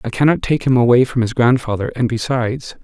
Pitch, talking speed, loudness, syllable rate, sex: 125 Hz, 210 wpm, -16 LUFS, 5.9 syllables/s, male